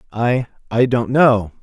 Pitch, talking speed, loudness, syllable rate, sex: 120 Hz, 110 wpm, -17 LUFS, 3.8 syllables/s, male